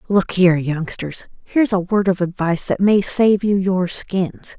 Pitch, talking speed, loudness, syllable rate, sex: 190 Hz, 185 wpm, -18 LUFS, 4.7 syllables/s, female